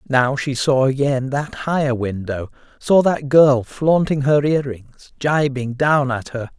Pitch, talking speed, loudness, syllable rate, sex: 135 Hz, 165 wpm, -18 LUFS, 3.8 syllables/s, male